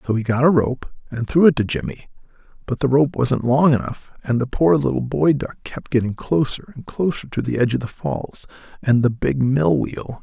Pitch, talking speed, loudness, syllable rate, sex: 130 Hz, 215 wpm, -19 LUFS, 5.2 syllables/s, male